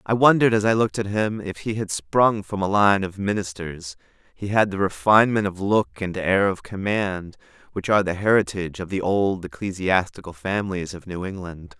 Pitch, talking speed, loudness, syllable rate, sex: 100 Hz, 195 wpm, -22 LUFS, 5.3 syllables/s, male